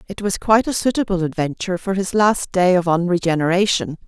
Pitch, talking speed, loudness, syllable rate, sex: 185 Hz, 175 wpm, -18 LUFS, 5.9 syllables/s, female